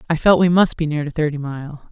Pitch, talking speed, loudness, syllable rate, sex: 155 Hz, 280 wpm, -18 LUFS, 5.9 syllables/s, female